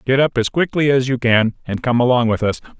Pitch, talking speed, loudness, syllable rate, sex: 125 Hz, 260 wpm, -17 LUFS, 5.7 syllables/s, male